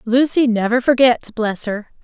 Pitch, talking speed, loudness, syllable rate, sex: 235 Hz, 150 wpm, -17 LUFS, 4.4 syllables/s, female